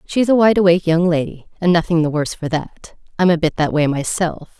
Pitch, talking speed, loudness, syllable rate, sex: 170 Hz, 250 wpm, -17 LUFS, 6.0 syllables/s, female